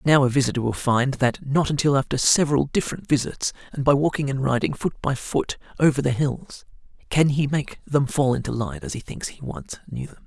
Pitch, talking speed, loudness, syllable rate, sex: 135 Hz, 215 wpm, -23 LUFS, 5.5 syllables/s, male